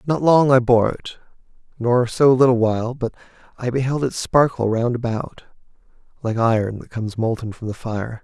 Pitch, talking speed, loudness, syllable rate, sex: 120 Hz, 175 wpm, -19 LUFS, 5.0 syllables/s, male